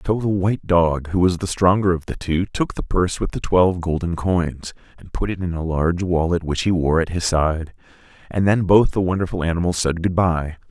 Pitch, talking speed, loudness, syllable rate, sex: 90 Hz, 230 wpm, -20 LUFS, 5.4 syllables/s, male